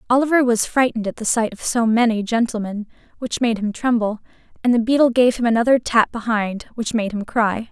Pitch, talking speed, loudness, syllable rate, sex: 230 Hz, 200 wpm, -19 LUFS, 5.7 syllables/s, female